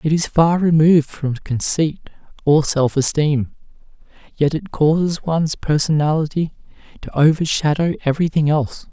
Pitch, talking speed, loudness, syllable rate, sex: 155 Hz, 120 wpm, -18 LUFS, 5.0 syllables/s, male